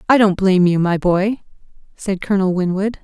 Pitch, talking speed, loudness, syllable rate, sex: 190 Hz, 180 wpm, -16 LUFS, 5.6 syllables/s, female